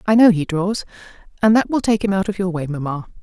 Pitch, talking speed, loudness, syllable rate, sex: 195 Hz, 260 wpm, -18 LUFS, 6.2 syllables/s, female